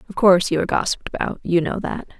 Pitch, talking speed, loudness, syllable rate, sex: 185 Hz, 220 wpm, -20 LUFS, 7.6 syllables/s, female